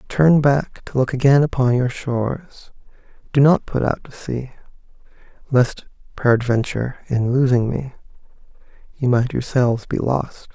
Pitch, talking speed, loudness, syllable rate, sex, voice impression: 130 Hz, 135 wpm, -19 LUFS, 4.6 syllables/s, male, masculine, very adult-like, middle-aged, very relaxed, very weak, dark, very soft, muffled, slightly halting, slightly raspy, cool, very intellectual, slightly refreshing, very sincere, very calm, slightly mature, friendly, very reassuring, very unique, very elegant, wild, very sweet, very kind, very modest